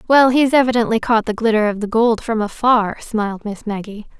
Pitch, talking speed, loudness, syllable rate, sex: 225 Hz, 200 wpm, -17 LUFS, 5.4 syllables/s, female